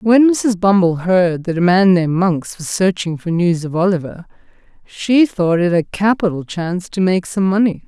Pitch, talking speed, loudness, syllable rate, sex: 185 Hz, 190 wpm, -16 LUFS, 4.7 syllables/s, female